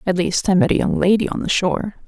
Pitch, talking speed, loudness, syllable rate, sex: 185 Hz, 290 wpm, -18 LUFS, 6.5 syllables/s, female